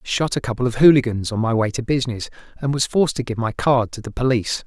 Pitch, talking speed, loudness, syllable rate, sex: 120 Hz, 255 wpm, -20 LUFS, 6.5 syllables/s, male